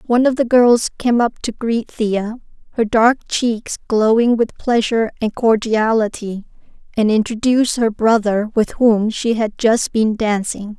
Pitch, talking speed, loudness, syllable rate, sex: 225 Hz, 155 wpm, -16 LUFS, 4.3 syllables/s, female